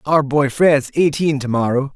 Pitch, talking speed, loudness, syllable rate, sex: 140 Hz, 215 wpm, -16 LUFS, 5.0 syllables/s, male